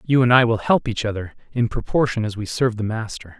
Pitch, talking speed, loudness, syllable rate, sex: 115 Hz, 245 wpm, -20 LUFS, 6.2 syllables/s, male